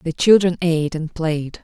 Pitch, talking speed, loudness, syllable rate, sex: 165 Hz, 185 wpm, -18 LUFS, 4.7 syllables/s, female